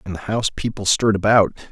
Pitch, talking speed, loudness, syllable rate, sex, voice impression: 105 Hz, 210 wpm, -19 LUFS, 6.5 syllables/s, male, masculine, middle-aged, slightly powerful, clear, fluent, intellectual, calm, mature, wild, lively, slightly strict, slightly sharp